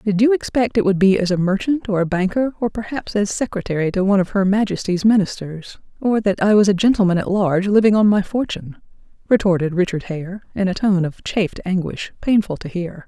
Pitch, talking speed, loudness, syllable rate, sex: 195 Hz, 205 wpm, -18 LUFS, 5.8 syllables/s, female